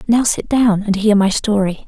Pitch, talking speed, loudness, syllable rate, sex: 210 Hz, 225 wpm, -15 LUFS, 4.6 syllables/s, female